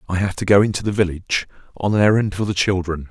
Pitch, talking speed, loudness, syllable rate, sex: 95 Hz, 250 wpm, -19 LUFS, 6.8 syllables/s, male